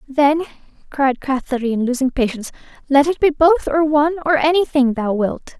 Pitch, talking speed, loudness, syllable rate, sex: 280 Hz, 160 wpm, -17 LUFS, 5.4 syllables/s, female